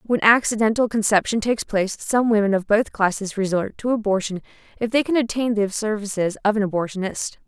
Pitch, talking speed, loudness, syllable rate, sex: 210 Hz, 175 wpm, -21 LUFS, 5.9 syllables/s, female